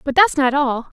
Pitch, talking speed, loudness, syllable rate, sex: 280 Hz, 245 wpm, -17 LUFS, 4.8 syllables/s, female